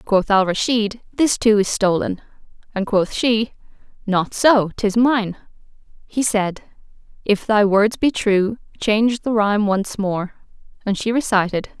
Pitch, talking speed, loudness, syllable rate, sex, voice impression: 210 Hz, 145 wpm, -19 LUFS, 4.2 syllables/s, female, feminine, adult-like, tensed, powerful, clear, fluent, intellectual, calm, elegant, lively, strict, sharp